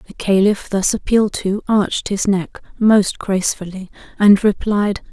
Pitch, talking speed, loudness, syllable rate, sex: 200 Hz, 140 wpm, -16 LUFS, 4.5 syllables/s, female